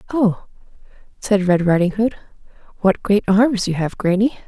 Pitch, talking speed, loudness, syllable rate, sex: 200 Hz, 150 wpm, -18 LUFS, 4.7 syllables/s, female